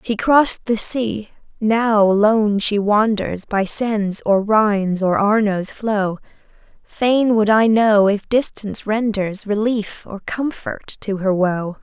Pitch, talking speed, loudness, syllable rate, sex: 210 Hz, 135 wpm, -18 LUFS, 3.5 syllables/s, female